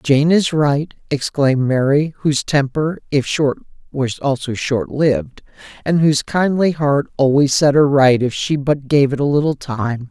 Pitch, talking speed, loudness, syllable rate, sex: 140 Hz, 165 wpm, -16 LUFS, 4.4 syllables/s, male